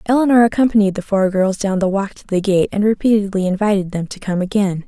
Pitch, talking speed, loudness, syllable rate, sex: 200 Hz, 220 wpm, -17 LUFS, 6.2 syllables/s, female